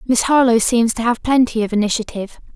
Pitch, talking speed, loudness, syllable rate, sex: 235 Hz, 190 wpm, -16 LUFS, 6.5 syllables/s, female